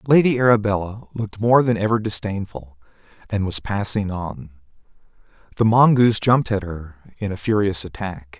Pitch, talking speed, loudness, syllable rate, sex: 100 Hz, 145 wpm, -20 LUFS, 5.3 syllables/s, male